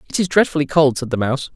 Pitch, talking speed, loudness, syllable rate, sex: 140 Hz, 270 wpm, -17 LUFS, 7.3 syllables/s, male